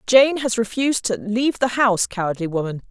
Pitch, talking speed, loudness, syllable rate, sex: 225 Hz, 185 wpm, -20 LUFS, 6.0 syllables/s, female